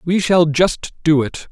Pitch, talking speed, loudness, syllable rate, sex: 165 Hz, 200 wpm, -16 LUFS, 3.7 syllables/s, male